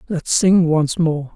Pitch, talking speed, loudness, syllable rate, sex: 170 Hz, 175 wpm, -16 LUFS, 3.4 syllables/s, female